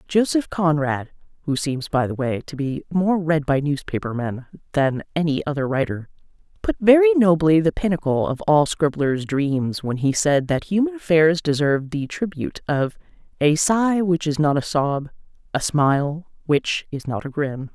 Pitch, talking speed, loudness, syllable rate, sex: 155 Hz, 170 wpm, -21 LUFS, 3.6 syllables/s, female